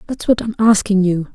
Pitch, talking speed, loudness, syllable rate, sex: 210 Hz, 225 wpm, -16 LUFS, 5.4 syllables/s, female